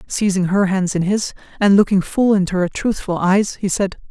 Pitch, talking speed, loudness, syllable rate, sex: 195 Hz, 205 wpm, -17 LUFS, 4.9 syllables/s, female